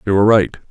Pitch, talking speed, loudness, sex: 100 Hz, 255 wpm, -14 LUFS, male